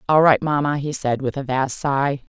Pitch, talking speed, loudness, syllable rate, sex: 140 Hz, 230 wpm, -20 LUFS, 4.8 syllables/s, female